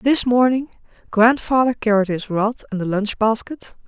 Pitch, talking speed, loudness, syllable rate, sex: 225 Hz, 155 wpm, -18 LUFS, 4.5 syllables/s, female